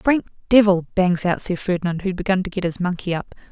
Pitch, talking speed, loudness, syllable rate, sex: 185 Hz, 220 wpm, -20 LUFS, 6.0 syllables/s, female